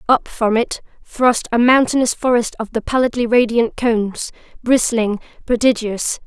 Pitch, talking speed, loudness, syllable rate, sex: 235 Hz, 135 wpm, -17 LUFS, 4.6 syllables/s, female